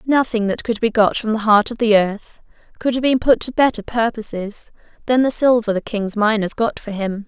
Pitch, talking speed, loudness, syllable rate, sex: 225 Hz, 225 wpm, -18 LUFS, 5.1 syllables/s, female